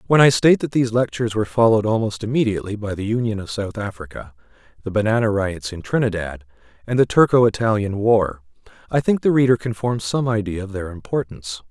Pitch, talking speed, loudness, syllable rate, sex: 110 Hz, 190 wpm, -20 LUFS, 6.3 syllables/s, male